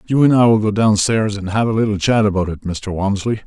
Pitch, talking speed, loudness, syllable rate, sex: 105 Hz, 260 wpm, -16 LUFS, 5.8 syllables/s, male